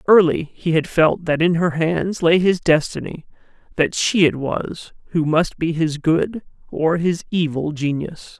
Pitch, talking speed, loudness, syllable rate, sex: 165 Hz, 170 wpm, -19 LUFS, 4.0 syllables/s, male